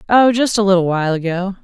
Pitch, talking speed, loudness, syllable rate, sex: 195 Hz, 220 wpm, -15 LUFS, 6.4 syllables/s, female